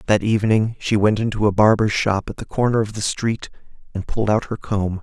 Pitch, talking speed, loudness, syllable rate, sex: 105 Hz, 225 wpm, -20 LUFS, 5.7 syllables/s, male